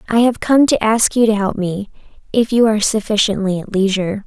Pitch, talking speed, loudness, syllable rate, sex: 215 Hz, 210 wpm, -15 LUFS, 5.7 syllables/s, female